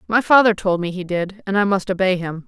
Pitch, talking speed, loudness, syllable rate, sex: 195 Hz, 265 wpm, -18 LUFS, 5.8 syllables/s, female